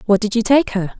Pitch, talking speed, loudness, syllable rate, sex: 225 Hz, 305 wpm, -16 LUFS, 6.2 syllables/s, female